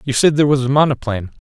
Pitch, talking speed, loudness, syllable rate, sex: 135 Hz, 245 wpm, -16 LUFS, 7.9 syllables/s, male